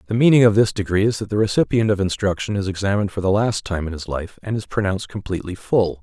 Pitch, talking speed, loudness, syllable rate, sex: 100 Hz, 250 wpm, -20 LUFS, 6.7 syllables/s, male